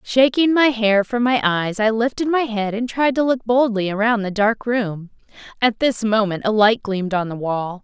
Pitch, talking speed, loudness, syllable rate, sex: 220 Hz, 215 wpm, -18 LUFS, 4.6 syllables/s, female